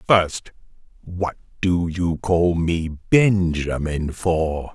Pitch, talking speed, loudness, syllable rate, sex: 85 Hz, 100 wpm, -21 LUFS, 2.8 syllables/s, male